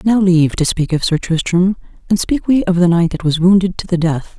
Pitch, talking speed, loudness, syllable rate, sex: 180 Hz, 260 wpm, -15 LUFS, 5.5 syllables/s, female